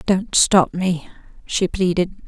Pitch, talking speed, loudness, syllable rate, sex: 180 Hz, 130 wpm, -19 LUFS, 3.5 syllables/s, female